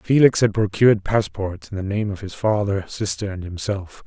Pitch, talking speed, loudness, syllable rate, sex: 100 Hz, 190 wpm, -21 LUFS, 5.0 syllables/s, male